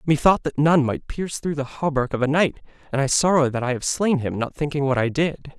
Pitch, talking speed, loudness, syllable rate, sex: 145 Hz, 260 wpm, -22 LUFS, 5.7 syllables/s, male